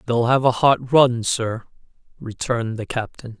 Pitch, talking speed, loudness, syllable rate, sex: 120 Hz, 160 wpm, -19 LUFS, 4.4 syllables/s, male